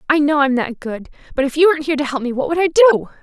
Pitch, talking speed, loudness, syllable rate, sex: 285 Hz, 315 wpm, -16 LUFS, 7.1 syllables/s, female